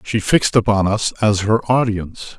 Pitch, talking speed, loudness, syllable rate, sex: 105 Hz, 175 wpm, -17 LUFS, 5.0 syllables/s, male